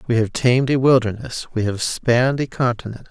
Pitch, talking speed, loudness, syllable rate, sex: 120 Hz, 195 wpm, -19 LUFS, 5.6 syllables/s, male